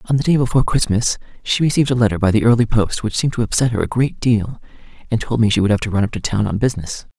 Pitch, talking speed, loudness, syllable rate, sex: 115 Hz, 285 wpm, -17 LUFS, 7.2 syllables/s, male